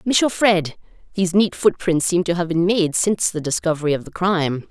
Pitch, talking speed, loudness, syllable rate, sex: 175 Hz, 205 wpm, -19 LUFS, 5.7 syllables/s, female